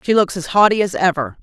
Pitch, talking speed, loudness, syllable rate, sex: 180 Hz, 255 wpm, -16 LUFS, 6.2 syllables/s, female